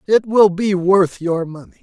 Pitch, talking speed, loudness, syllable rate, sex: 185 Hz, 195 wpm, -16 LUFS, 4.5 syllables/s, male